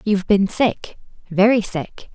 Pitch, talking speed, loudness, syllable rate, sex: 200 Hz, 110 wpm, -18 LUFS, 4.1 syllables/s, female